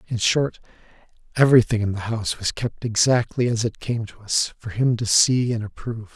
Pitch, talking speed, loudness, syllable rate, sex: 110 Hz, 195 wpm, -21 LUFS, 5.4 syllables/s, male